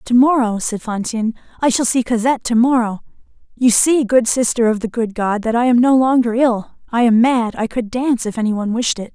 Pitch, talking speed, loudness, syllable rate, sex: 235 Hz, 230 wpm, -16 LUFS, 5.7 syllables/s, female